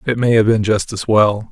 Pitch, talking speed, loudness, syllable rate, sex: 110 Hz, 275 wpm, -15 LUFS, 5.1 syllables/s, male